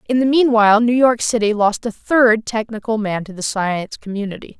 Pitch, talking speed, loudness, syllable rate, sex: 225 Hz, 195 wpm, -17 LUFS, 5.4 syllables/s, female